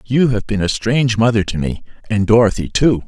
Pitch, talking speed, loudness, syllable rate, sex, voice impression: 110 Hz, 195 wpm, -16 LUFS, 5.6 syllables/s, male, masculine, middle-aged, slightly thick, slightly tensed, powerful, hard, slightly muffled, raspy, cool, calm, mature, wild, slightly lively, strict